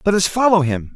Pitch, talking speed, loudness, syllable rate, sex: 175 Hz, 250 wpm, -16 LUFS, 6.0 syllables/s, male